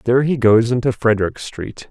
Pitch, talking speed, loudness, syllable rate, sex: 120 Hz, 190 wpm, -16 LUFS, 5.7 syllables/s, male